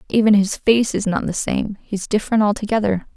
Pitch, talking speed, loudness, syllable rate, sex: 210 Hz, 190 wpm, -19 LUFS, 5.6 syllables/s, female